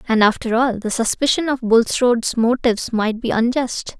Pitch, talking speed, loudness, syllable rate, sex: 235 Hz, 165 wpm, -18 LUFS, 5.0 syllables/s, female